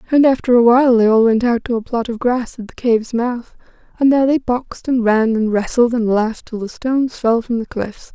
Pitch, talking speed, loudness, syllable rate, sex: 235 Hz, 250 wpm, -16 LUFS, 5.6 syllables/s, female